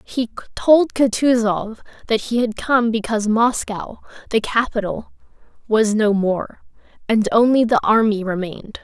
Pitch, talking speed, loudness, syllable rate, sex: 225 Hz, 130 wpm, -18 LUFS, 4.4 syllables/s, female